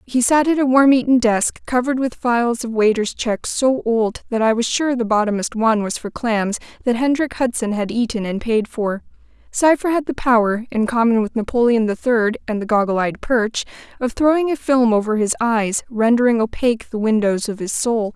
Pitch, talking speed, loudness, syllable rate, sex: 235 Hz, 205 wpm, -18 LUFS, 5.3 syllables/s, female